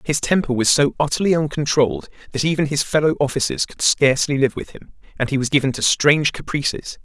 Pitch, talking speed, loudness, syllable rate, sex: 145 Hz, 195 wpm, -18 LUFS, 6.1 syllables/s, male